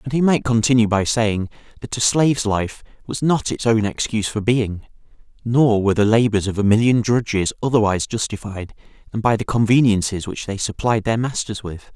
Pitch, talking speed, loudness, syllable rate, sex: 110 Hz, 185 wpm, -19 LUFS, 5.4 syllables/s, male